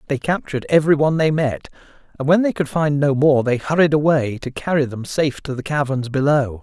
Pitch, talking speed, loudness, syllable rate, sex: 140 Hz, 215 wpm, -18 LUFS, 6.0 syllables/s, male